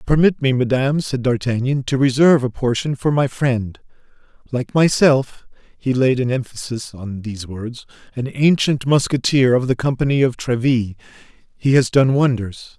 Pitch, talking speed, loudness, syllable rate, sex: 130 Hz, 155 wpm, -18 LUFS, 4.3 syllables/s, male